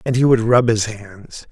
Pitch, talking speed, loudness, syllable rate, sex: 115 Hz, 235 wpm, -16 LUFS, 4.3 syllables/s, male